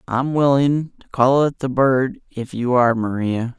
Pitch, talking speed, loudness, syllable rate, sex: 130 Hz, 185 wpm, -18 LUFS, 4.2 syllables/s, male